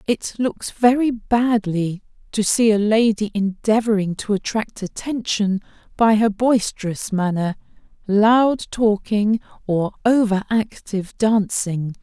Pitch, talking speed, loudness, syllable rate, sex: 210 Hz, 110 wpm, -20 LUFS, 3.9 syllables/s, female